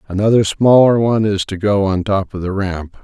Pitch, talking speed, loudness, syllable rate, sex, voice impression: 100 Hz, 215 wpm, -15 LUFS, 5.3 syllables/s, male, very masculine, very adult-like, very middle-aged, very thick, tensed, powerful, dark, slightly soft, slightly muffled, slightly fluent, very cool, intellectual, very sincere, very calm, very mature, very friendly, very reassuring, unique, slightly elegant, wild, slightly sweet, kind, slightly modest